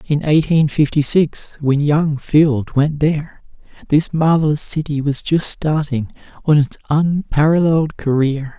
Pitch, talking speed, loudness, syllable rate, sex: 150 Hz, 135 wpm, -16 LUFS, 4.1 syllables/s, male